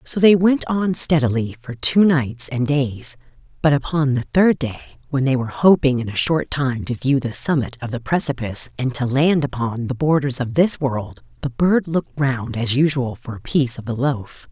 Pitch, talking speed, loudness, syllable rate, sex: 135 Hz, 210 wpm, -19 LUFS, 4.9 syllables/s, female